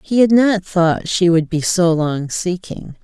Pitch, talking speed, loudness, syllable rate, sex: 175 Hz, 200 wpm, -16 LUFS, 3.8 syllables/s, female